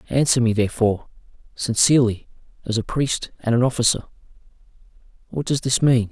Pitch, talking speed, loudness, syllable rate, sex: 120 Hz, 135 wpm, -20 LUFS, 6.0 syllables/s, male